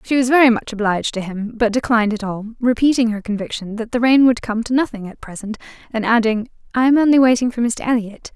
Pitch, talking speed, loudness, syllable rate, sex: 230 Hz, 230 wpm, -17 LUFS, 6.3 syllables/s, female